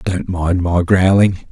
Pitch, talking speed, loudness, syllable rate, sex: 90 Hz, 160 wpm, -15 LUFS, 3.6 syllables/s, male